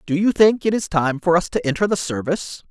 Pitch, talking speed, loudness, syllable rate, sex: 175 Hz, 265 wpm, -19 LUFS, 6.0 syllables/s, male